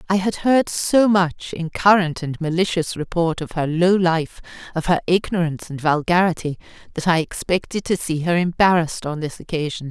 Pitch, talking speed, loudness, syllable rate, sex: 170 Hz, 175 wpm, -20 LUFS, 5.1 syllables/s, female